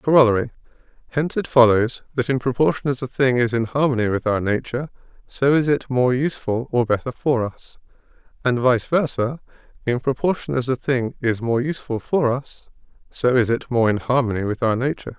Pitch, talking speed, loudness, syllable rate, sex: 125 Hz, 180 wpm, -21 LUFS, 5.6 syllables/s, male